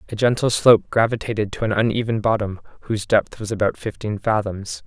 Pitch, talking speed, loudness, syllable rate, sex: 110 Hz, 175 wpm, -20 LUFS, 6.0 syllables/s, male